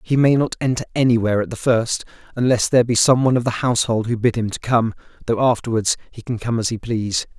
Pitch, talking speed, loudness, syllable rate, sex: 115 Hz, 235 wpm, -19 LUFS, 6.6 syllables/s, male